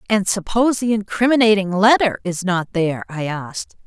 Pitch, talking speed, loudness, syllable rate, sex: 200 Hz, 155 wpm, -18 LUFS, 5.4 syllables/s, female